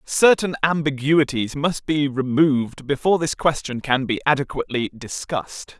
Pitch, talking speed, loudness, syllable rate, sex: 145 Hz, 125 wpm, -21 LUFS, 4.9 syllables/s, male